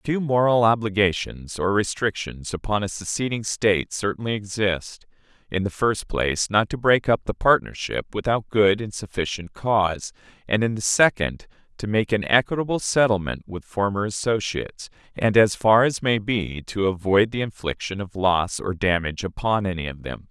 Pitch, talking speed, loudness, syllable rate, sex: 105 Hz, 165 wpm, -22 LUFS, 4.9 syllables/s, male